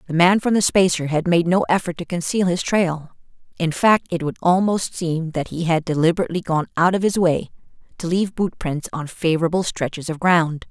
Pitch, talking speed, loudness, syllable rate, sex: 170 Hz, 205 wpm, -20 LUFS, 5.4 syllables/s, female